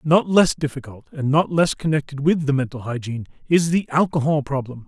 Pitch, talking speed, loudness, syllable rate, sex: 145 Hz, 185 wpm, -20 LUFS, 5.6 syllables/s, male